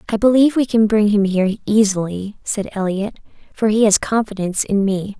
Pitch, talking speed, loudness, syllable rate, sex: 210 Hz, 185 wpm, -17 LUFS, 5.6 syllables/s, female